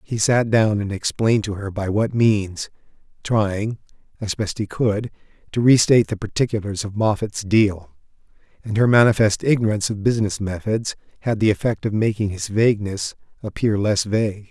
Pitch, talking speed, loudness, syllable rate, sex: 105 Hz, 160 wpm, -20 LUFS, 5.2 syllables/s, male